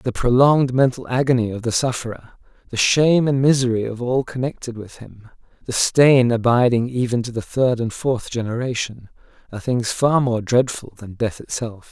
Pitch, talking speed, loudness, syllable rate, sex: 120 Hz, 170 wpm, -19 LUFS, 5.2 syllables/s, male